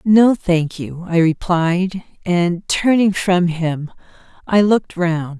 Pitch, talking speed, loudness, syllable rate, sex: 180 Hz, 135 wpm, -17 LUFS, 3.3 syllables/s, female